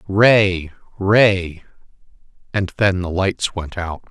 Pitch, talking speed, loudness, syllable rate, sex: 95 Hz, 115 wpm, -18 LUFS, 3.0 syllables/s, male